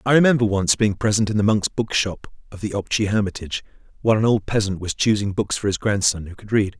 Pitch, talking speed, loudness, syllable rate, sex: 105 Hz, 230 wpm, -21 LUFS, 6.2 syllables/s, male